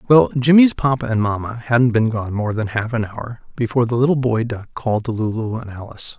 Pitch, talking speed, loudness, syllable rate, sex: 115 Hz, 225 wpm, -18 LUFS, 5.7 syllables/s, male